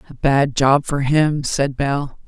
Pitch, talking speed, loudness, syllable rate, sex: 140 Hz, 185 wpm, -18 LUFS, 3.5 syllables/s, female